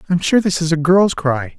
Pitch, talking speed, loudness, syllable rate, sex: 165 Hz, 265 wpm, -16 LUFS, 5.0 syllables/s, male